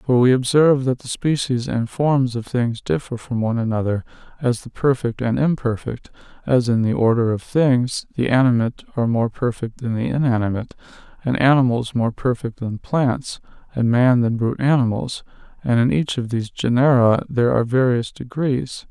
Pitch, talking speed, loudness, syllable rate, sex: 125 Hz, 170 wpm, -20 LUFS, 5.2 syllables/s, male